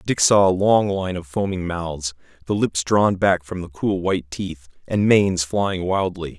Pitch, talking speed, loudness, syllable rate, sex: 90 Hz, 195 wpm, -20 LUFS, 4.4 syllables/s, male